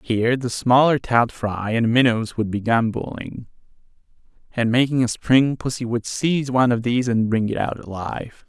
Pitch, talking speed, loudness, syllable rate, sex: 120 Hz, 175 wpm, -20 LUFS, 5.1 syllables/s, male